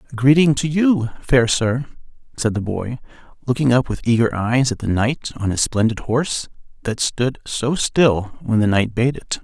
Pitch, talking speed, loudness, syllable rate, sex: 125 Hz, 185 wpm, -19 LUFS, 4.5 syllables/s, male